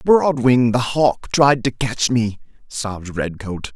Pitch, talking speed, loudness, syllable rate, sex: 120 Hz, 145 wpm, -18 LUFS, 3.6 syllables/s, male